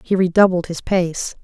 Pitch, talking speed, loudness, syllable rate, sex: 180 Hz, 165 wpm, -17 LUFS, 4.7 syllables/s, female